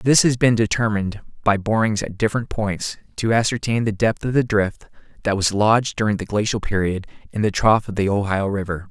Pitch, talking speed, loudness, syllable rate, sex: 105 Hz, 200 wpm, -20 LUFS, 5.6 syllables/s, male